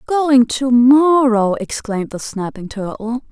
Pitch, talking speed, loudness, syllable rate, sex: 240 Hz, 125 wpm, -15 LUFS, 3.9 syllables/s, female